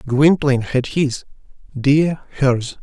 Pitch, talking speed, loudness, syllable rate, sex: 140 Hz, 105 wpm, -17 LUFS, 3.2 syllables/s, male